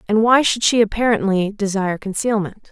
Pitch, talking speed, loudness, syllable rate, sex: 210 Hz, 155 wpm, -18 LUFS, 5.5 syllables/s, female